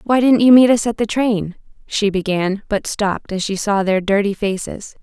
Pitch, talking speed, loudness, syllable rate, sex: 205 Hz, 215 wpm, -17 LUFS, 4.9 syllables/s, female